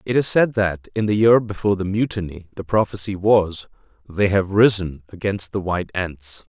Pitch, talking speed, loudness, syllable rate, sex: 100 Hz, 185 wpm, -20 LUFS, 5.0 syllables/s, male